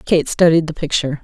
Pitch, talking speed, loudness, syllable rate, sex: 155 Hz, 195 wpm, -16 LUFS, 6.3 syllables/s, female